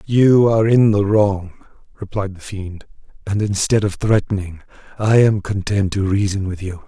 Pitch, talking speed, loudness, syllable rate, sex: 100 Hz, 165 wpm, -17 LUFS, 4.7 syllables/s, male